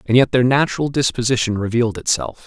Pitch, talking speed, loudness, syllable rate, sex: 120 Hz, 170 wpm, -18 LUFS, 6.4 syllables/s, male